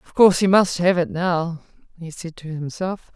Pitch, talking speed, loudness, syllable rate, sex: 175 Hz, 210 wpm, -20 LUFS, 4.9 syllables/s, female